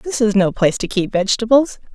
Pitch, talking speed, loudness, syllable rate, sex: 215 Hz, 215 wpm, -17 LUFS, 6.2 syllables/s, female